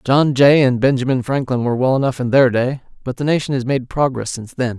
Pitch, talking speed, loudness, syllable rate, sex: 130 Hz, 240 wpm, -17 LUFS, 6.0 syllables/s, male